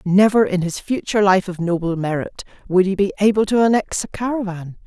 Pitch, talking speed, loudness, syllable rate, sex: 195 Hz, 195 wpm, -18 LUFS, 5.9 syllables/s, female